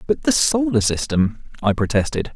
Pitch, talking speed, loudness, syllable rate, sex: 130 Hz, 155 wpm, -19 LUFS, 5.0 syllables/s, male